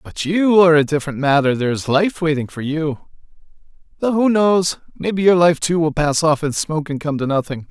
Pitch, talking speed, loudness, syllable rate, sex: 160 Hz, 220 wpm, -17 LUFS, 5.6 syllables/s, male